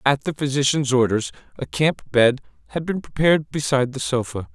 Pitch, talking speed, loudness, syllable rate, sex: 140 Hz, 170 wpm, -21 LUFS, 5.4 syllables/s, male